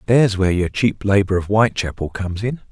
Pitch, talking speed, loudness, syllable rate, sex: 100 Hz, 200 wpm, -18 LUFS, 6.5 syllables/s, male